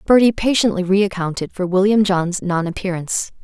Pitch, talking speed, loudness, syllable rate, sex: 190 Hz, 140 wpm, -18 LUFS, 5.4 syllables/s, female